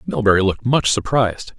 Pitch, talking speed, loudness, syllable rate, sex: 110 Hz, 150 wpm, -17 LUFS, 6.1 syllables/s, male